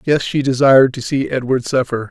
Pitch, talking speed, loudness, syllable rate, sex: 130 Hz, 200 wpm, -15 LUFS, 5.5 syllables/s, male